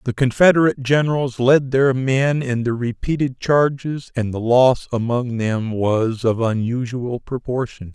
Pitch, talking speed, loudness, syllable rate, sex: 125 Hz, 145 wpm, -19 LUFS, 4.3 syllables/s, male